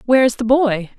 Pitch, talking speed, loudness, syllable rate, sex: 240 Hz, 245 wpm, -16 LUFS, 6.3 syllables/s, female